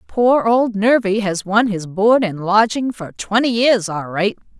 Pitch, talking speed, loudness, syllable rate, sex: 210 Hz, 185 wpm, -16 LUFS, 4.0 syllables/s, female